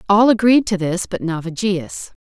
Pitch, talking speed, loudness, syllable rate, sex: 195 Hz, 160 wpm, -17 LUFS, 4.7 syllables/s, female